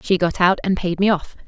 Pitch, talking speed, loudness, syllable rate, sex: 185 Hz, 285 wpm, -19 LUFS, 5.6 syllables/s, female